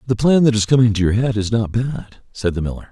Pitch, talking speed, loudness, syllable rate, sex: 115 Hz, 290 wpm, -17 LUFS, 6.1 syllables/s, male